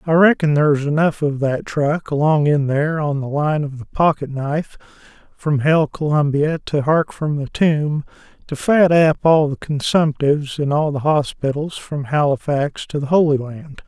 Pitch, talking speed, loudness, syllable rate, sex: 150 Hz, 175 wpm, -18 LUFS, 4.6 syllables/s, male